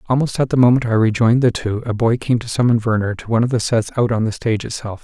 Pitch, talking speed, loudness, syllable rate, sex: 115 Hz, 285 wpm, -17 LUFS, 6.9 syllables/s, male